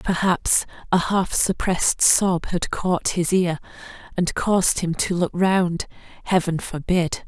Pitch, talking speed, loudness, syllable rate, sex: 180 Hz, 130 wpm, -21 LUFS, 3.9 syllables/s, female